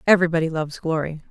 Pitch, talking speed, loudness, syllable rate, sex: 165 Hz, 140 wpm, -22 LUFS, 8.2 syllables/s, female